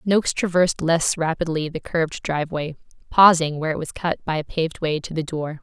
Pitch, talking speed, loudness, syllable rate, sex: 160 Hz, 205 wpm, -21 LUFS, 5.8 syllables/s, female